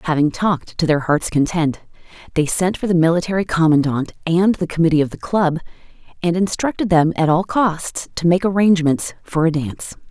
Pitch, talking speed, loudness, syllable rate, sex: 170 Hz, 180 wpm, -18 LUFS, 5.4 syllables/s, female